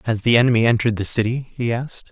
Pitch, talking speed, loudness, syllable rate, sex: 115 Hz, 225 wpm, -19 LUFS, 7.3 syllables/s, male